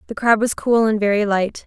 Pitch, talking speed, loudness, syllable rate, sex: 215 Hz, 250 wpm, -18 LUFS, 5.4 syllables/s, female